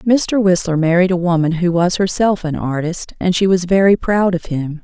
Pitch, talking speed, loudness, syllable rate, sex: 180 Hz, 210 wpm, -16 LUFS, 4.9 syllables/s, female